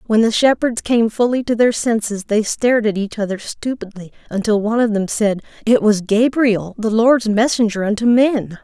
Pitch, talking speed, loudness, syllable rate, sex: 220 Hz, 190 wpm, -17 LUFS, 5.0 syllables/s, female